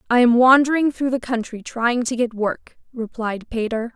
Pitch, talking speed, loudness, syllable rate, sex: 240 Hz, 180 wpm, -19 LUFS, 4.7 syllables/s, female